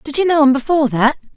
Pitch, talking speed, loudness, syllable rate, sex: 285 Hz, 265 wpm, -14 LUFS, 7.1 syllables/s, female